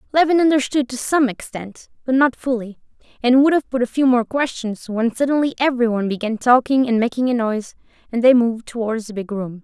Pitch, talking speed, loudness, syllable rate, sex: 245 Hz, 200 wpm, -18 LUFS, 5.9 syllables/s, female